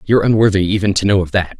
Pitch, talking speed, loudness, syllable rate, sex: 100 Hz, 265 wpm, -14 LUFS, 7.6 syllables/s, male